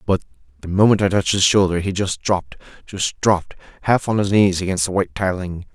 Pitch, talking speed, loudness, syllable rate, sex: 95 Hz, 200 wpm, -19 LUFS, 6.1 syllables/s, male